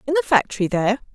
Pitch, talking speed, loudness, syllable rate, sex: 245 Hz, 210 wpm, -20 LUFS, 8.9 syllables/s, female